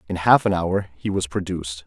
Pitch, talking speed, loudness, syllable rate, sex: 90 Hz, 225 wpm, -21 LUFS, 5.5 syllables/s, male